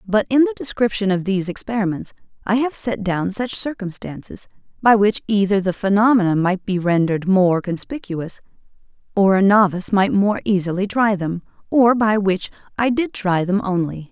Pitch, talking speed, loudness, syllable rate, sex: 200 Hz, 165 wpm, -19 LUFS, 5.1 syllables/s, female